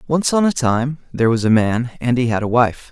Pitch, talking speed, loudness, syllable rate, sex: 125 Hz, 265 wpm, -17 LUFS, 5.5 syllables/s, male